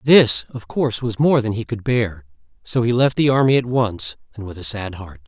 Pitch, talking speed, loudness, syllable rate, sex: 120 Hz, 250 wpm, -19 LUFS, 5.1 syllables/s, male